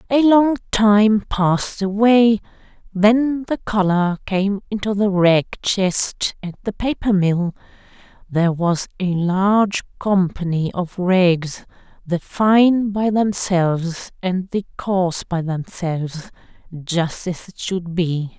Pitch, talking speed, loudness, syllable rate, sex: 190 Hz, 125 wpm, -18 LUFS, 3.5 syllables/s, female